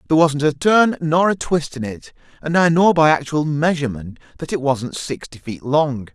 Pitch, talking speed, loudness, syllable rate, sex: 150 Hz, 205 wpm, -18 LUFS, 5.0 syllables/s, male